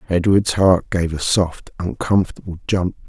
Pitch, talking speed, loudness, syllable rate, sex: 90 Hz, 135 wpm, -19 LUFS, 4.6 syllables/s, male